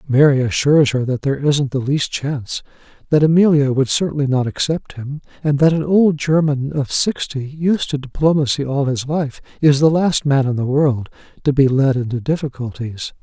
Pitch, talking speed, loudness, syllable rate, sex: 140 Hz, 175 wpm, -17 LUFS, 5.1 syllables/s, male